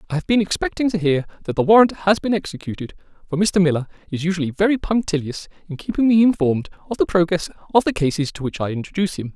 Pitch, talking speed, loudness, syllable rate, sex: 175 Hz, 220 wpm, -20 LUFS, 7.0 syllables/s, male